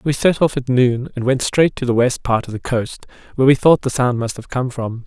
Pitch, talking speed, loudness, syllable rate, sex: 130 Hz, 285 wpm, -17 LUFS, 5.4 syllables/s, male